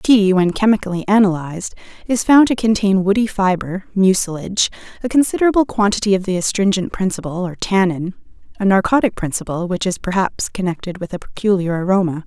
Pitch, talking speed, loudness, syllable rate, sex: 195 Hz, 150 wpm, -17 LUFS, 5.9 syllables/s, female